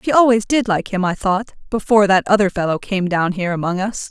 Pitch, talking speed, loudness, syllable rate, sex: 200 Hz, 235 wpm, -17 LUFS, 6.0 syllables/s, female